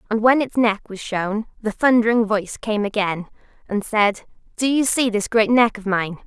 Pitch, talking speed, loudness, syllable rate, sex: 215 Hz, 200 wpm, -20 LUFS, 4.8 syllables/s, female